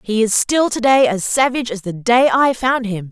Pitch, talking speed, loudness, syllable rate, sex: 230 Hz, 230 wpm, -16 LUFS, 5.0 syllables/s, female